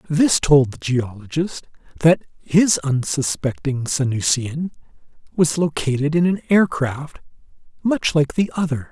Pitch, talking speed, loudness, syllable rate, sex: 150 Hz, 115 wpm, -19 LUFS, 4.0 syllables/s, male